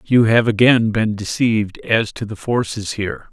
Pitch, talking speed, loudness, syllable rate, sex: 110 Hz, 180 wpm, -17 LUFS, 4.7 syllables/s, male